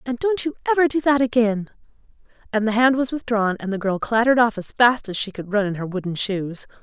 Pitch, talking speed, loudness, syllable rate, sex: 225 Hz, 235 wpm, -21 LUFS, 5.9 syllables/s, female